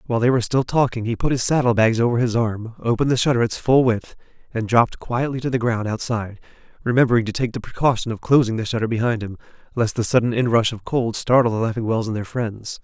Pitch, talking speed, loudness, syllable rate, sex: 115 Hz, 230 wpm, -20 LUFS, 6.5 syllables/s, male